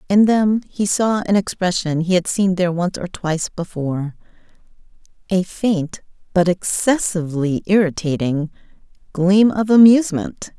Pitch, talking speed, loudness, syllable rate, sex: 185 Hz, 125 wpm, -18 LUFS, 4.7 syllables/s, female